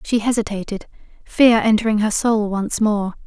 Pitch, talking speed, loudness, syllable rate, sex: 215 Hz, 145 wpm, -18 LUFS, 4.7 syllables/s, female